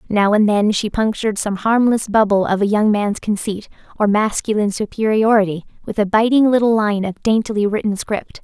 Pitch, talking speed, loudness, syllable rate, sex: 210 Hz, 180 wpm, -17 LUFS, 5.4 syllables/s, female